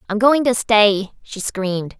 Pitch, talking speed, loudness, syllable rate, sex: 215 Hz, 180 wpm, -17 LUFS, 4.1 syllables/s, female